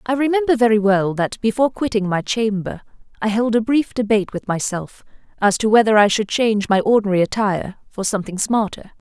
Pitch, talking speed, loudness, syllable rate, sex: 215 Hz, 185 wpm, -18 LUFS, 6.0 syllables/s, female